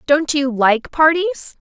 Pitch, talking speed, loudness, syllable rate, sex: 295 Hz, 145 wpm, -16 LUFS, 4.5 syllables/s, female